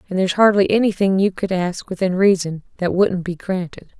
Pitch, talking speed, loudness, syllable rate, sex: 190 Hz, 195 wpm, -18 LUFS, 5.5 syllables/s, female